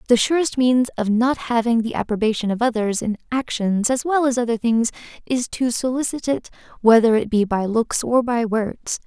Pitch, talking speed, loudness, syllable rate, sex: 235 Hz, 190 wpm, -20 LUFS, 5.0 syllables/s, female